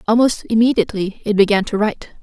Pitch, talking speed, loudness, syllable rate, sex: 215 Hz, 160 wpm, -17 LUFS, 6.5 syllables/s, female